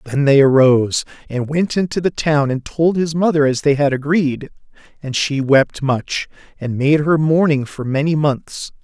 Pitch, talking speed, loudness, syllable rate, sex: 145 Hz, 185 wpm, -16 LUFS, 4.5 syllables/s, male